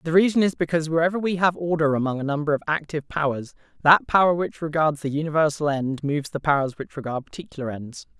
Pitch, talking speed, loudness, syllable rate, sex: 155 Hz, 205 wpm, -23 LUFS, 6.6 syllables/s, male